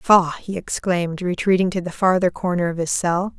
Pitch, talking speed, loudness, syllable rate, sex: 180 Hz, 195 wpm, -20 LUFS, 5.2 syllables/s, female